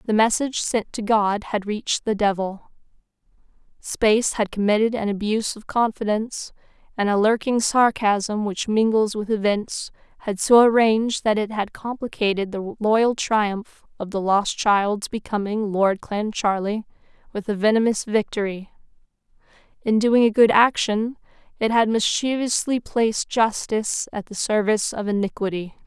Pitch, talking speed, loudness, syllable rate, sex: 215 Hz, 140 wpm, -21 LUFS, 4.7 syllables/s, female